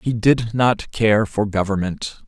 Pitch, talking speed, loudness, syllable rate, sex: 110 Hz, 160 wpm, -19 LUFS, 3.9 syllables/s, male